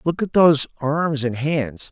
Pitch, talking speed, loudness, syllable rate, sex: 145 Hz, 190 wpm, -19 LUFS, 4.2 syllables/s, male